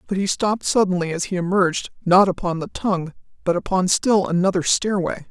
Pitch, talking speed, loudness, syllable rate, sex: 185 Hz, 180 wpm, -20 LUFS, 5.7 syllables/s, female